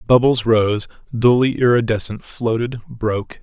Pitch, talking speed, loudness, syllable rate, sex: 115 Hz, 105 wpm, -18 LUFS, 4.4 syllables/s, male